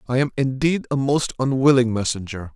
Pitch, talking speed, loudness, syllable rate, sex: 130 Hz, 165 wpm, -20 LUFS, 5.5 syllables/s, male